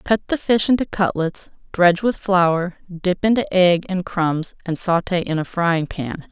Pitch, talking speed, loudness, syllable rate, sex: 180 Hz, 180 wpm, -19 LUFS, 4.3 syllables/s, female